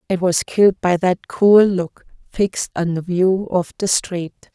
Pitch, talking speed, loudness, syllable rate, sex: 185 Hz, 185 wpm, -17 LUFS, 4.1 syllables/s, female